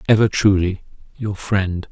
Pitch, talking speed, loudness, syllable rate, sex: 100 Hz, 125 wpm, -19 LUFS, 4.3 syllables/s, male